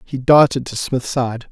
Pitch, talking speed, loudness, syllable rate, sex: 130 Hz, 195 wpm, -16 LUFS, 4.4 syllables/s, male